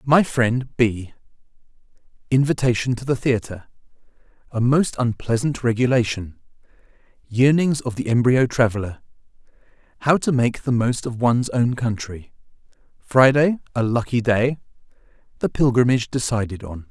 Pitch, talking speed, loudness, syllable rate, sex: 120 Hz, 95 wpm, -20 LUFS, 5.0 syllables/s, male